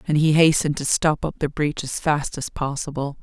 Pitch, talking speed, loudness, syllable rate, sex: 150 Hz, 225 wpm, -21 LUFS, 5.3 syllables/s, female